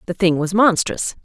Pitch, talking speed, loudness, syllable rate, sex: 185 Hz, 195 wpm, -17 LUFS, 4.9 syllables/s, female